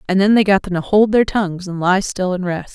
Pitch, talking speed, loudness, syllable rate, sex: 190 Hz, 305 wpm, -16 LUFS, 5.8 syllables/s, female